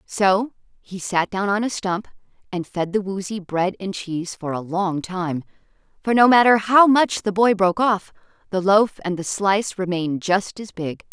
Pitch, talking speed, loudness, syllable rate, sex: 195 Hz, 195 wpm, -20 LUFS, 4.7 syllables/s, female